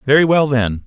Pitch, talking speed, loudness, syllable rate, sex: 130 Hz, 205 wpm, -14 LUFS, 5.3 syllables/s, male